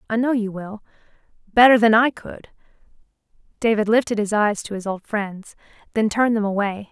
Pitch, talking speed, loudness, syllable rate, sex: 215 Hz, 175 wpm, -19 LUFS, 5.4 syllables/s, female